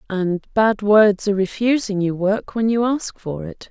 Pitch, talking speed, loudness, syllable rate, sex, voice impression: 205 Hz, 195 wpm, -19 LUFS, 4.3 syllables/s, female, feminine, middle-aged, slightly relaxed, powerful, clear, halting, slightly intellectual, slightly friendly, unique, lively, slightly strict, slightly sharp